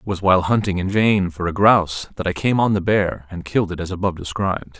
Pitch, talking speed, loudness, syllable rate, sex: 95 Hz, 265 wpm, -19 LUFS, 6.3 syllables/s, male